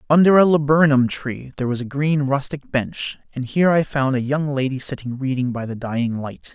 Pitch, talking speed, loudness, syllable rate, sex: 135 Hz, 210 wpm, -20 LUFS, 5.4 syllables/s, male